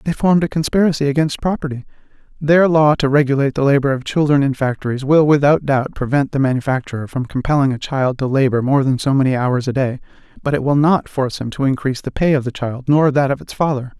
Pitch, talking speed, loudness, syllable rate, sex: 140 Hz, 225 wpm, -17 LUFS, 6.3 syllables/s, male